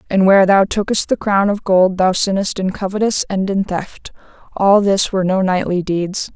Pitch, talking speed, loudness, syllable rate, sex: 195 Hz, 200 wpm, -15 LUFS, 5.1 syllables/s, female